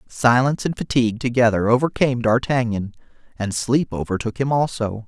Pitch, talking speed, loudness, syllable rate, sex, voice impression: 120 Hz, 130 wpm, -20 LUFS, 5.6 syllables/s, male, very masculine, slightly middle-aged, very thick, very tensed, very powerful, bright, slightly soft, very clear, fluent, slightly raspy, slightly cool, intellectual, very refreshing, sincere, slightly calm, mature, friendly, reassuring, very unique, wild, slightly sweet, very lively, slightly kind, intense